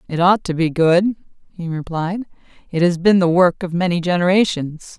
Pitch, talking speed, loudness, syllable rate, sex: 175 Hz, 180 wpm, -17 LUFS, 5.0 syllables/s, female